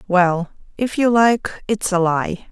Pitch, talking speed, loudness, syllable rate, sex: 195 Hz, 165 wpm, -18 LUFS, 3.4 syllables/s, female